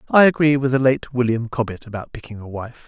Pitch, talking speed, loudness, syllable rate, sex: 125 Hz, 230 wpm, -19 LUFS, 6.1 syllables/s, male